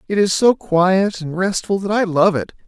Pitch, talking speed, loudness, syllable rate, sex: 185 Hz, 225 wpm, -17 LUFS, 4.6 syllables/s, male